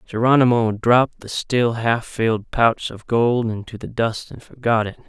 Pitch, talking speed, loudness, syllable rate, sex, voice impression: 115 Hz, 175 wpm, -19 LUFS, 4.5 syllables/s, male, masculine, adult-like, tensed, powerful, bright, clear, friendly, unique, wild, lively, intense, light